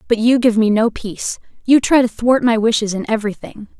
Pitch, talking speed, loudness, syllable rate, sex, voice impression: 225 Hz, 220 wpm, -16 LUFS, 5.8 syllables/s, female, feminine, slightly young, slightly tensed, powerful, slightly soft, clear, raspy, intellectual, slightly refreshing, friendly, elegant, lively, slightly sharp